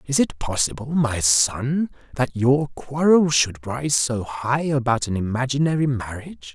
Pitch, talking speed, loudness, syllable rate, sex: 130 Hz, 145 wpm, -21 LUFS, 4.3 syllables/s, male